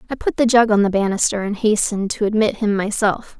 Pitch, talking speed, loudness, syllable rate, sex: 210 Hz, 230 wpm, -18 LUFS, 6.0 syllables/s, female